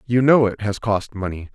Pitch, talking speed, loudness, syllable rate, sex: 105 Hz, 235 wpm, -20 LUFS, 4.9 syllables/s, male